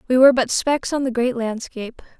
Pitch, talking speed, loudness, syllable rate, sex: 250 Hz, 220 wpm, -19 LUFS, 5.9 syllables/s, female